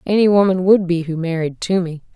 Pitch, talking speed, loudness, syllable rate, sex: 180 Hz, 195 wpm, -17 LUFS, 5.7 syllables/s, female